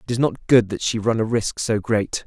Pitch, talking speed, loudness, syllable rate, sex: 110 Hz, 290 wpm, -20 LUFS, 5.1 syllables/s, male